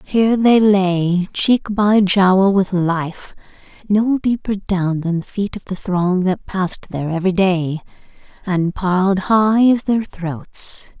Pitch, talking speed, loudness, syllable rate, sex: 190 Hz, 155 wpm, -17 LUFS, 3.6 syllables/s, female